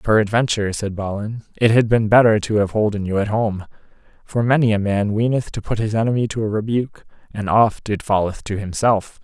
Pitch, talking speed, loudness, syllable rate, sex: 105 Hz, 200 wpm, -19 LUFS, 5.6 syllables/s, male